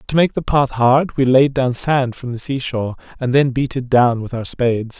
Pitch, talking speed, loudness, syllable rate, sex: 130 Hz, 250 wpm, -17 LUFS, 5.0 syllables/s, male